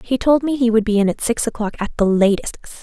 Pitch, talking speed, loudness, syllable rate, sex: 225 Hz, 275 wpm, -18 LUFS, 6.1 syllables/s, female